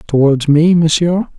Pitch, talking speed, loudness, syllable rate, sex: 160 Hz, 130 wpm, -12 LUFS, 4.2 syllables/s, male